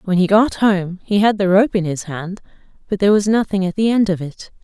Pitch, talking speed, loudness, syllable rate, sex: 195 Hz, 260 wpm, -17 LUFS, 5.6 syllables/s, female